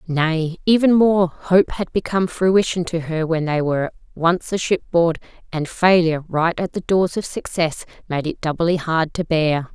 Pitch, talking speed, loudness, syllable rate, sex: 170 Hz, 180 wpm, -19 LUFS, 4.5 syllables/s, female